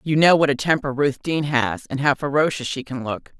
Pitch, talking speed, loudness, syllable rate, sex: 140 Hz, 245 wpm, -20 LUFS, 5.6 syllables/s, female